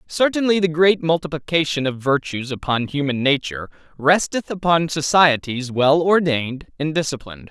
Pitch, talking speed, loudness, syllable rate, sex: 155 Hz, 130 wpm, -19 LUFS, 5.1 syllables/s, male